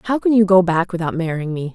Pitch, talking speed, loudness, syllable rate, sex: 185 Hz, 275 wpm, -17 LUFS, 6.3 syllables/s, female